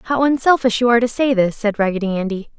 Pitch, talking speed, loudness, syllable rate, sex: 225 Hz, 230 wpm, -17 LUFS, 6.8 syllables/s, female